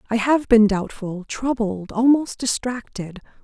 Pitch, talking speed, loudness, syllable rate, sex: 225 Hz, 120 wpm, -20 LUFS, 4.0 syllables/s, female